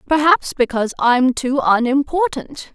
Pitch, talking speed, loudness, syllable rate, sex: 275 Hz, 110 wpm, -16 LUFS, 4.4 syllables/s, female